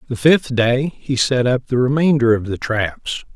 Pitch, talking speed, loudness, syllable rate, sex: 130 Hz, 195 wpm, -17 LUFS, 4.3 syllables/s, male